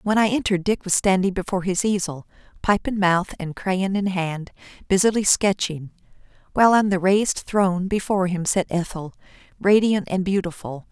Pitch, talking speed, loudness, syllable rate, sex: 190 Hz, 165 wpm, -21 LUFS, 5.3 syllables/s, female